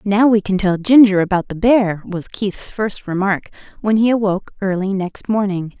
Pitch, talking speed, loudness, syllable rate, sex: 200 Hz, 185 wpm, -17 LUFS, 4.8 syllables/s, female